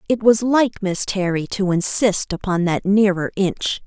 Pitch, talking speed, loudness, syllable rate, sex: 195 Hz, 170 wpm, -19 LUFS, 4.2 syllables/s, female